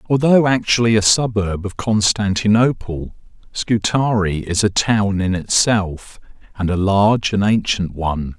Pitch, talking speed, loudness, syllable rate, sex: 105 Hz, 130 wpm, -17 LUFS, 4.3 syllables/s, male